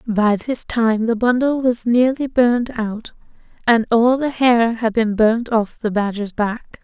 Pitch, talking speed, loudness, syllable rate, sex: 230 Hz, 175 wpm, -18 LUFS, 4.1 syllables/s, female